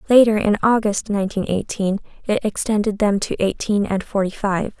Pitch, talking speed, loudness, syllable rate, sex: 205 Hz, 165 wpm, -20 LUFS, 5.3 syllables/s, female